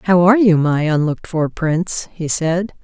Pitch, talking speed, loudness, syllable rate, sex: 170 Hz, 190 wpm, -16 LUFS, 4.8 syllables/s, female